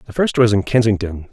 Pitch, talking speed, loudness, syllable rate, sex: 110 Hz, 225 wpm, -16 LUFS, 6.2 syllables/s, male